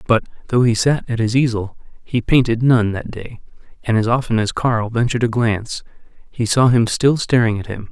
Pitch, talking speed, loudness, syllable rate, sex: 115 Hz, 205 wpm, -17 LUFS, 5.3 syllables/s, male